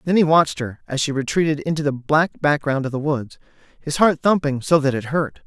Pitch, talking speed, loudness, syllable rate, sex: 150 Hz, 230 wpm, -20 LUFS, 5.7 syllables/s, male